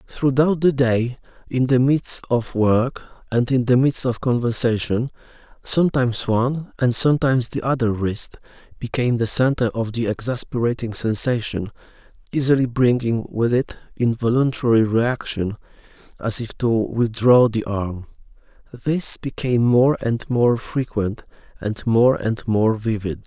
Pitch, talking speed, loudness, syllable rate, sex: 120 Hz, 130 wpm, -20 LUFS, 4.5 syllables/s, male